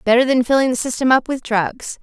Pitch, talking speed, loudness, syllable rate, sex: 245 Hz, 235 wpm, -17 LUFS, 5.6 syllables/s, female